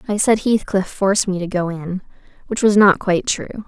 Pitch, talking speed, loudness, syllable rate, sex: 195 Hz, 210 wpm, -18 LUFS, 5.6 syllables/s, female